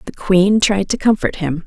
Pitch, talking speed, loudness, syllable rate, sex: 195 Hz, 215 wpm, -16 LUFS, 4.6 syllables/s, female